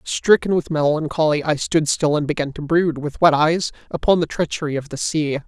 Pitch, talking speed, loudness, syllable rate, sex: 155 Hz, 210 wpm, -19 LUFS, 5.3 syllables/s, male